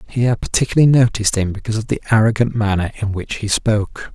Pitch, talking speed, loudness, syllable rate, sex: 110 Hz, 205 wpm, -17 LUFS, 6.8 syllables/s, male